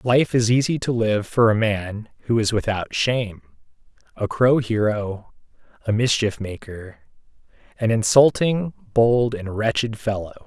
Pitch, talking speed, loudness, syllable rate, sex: 110 Hz, 140 wpm, -21 LUFS, 4.1 syllables/s, male